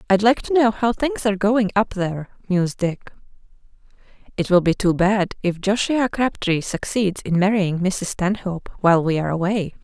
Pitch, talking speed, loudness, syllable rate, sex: 195 Hz, 175 wpm, -20 LUFS, 5.2 syllables/s, female